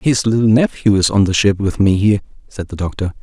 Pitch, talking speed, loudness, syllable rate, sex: 100 Hz, 240 wpm, -15 LUFS, 5.9 syllables/s, male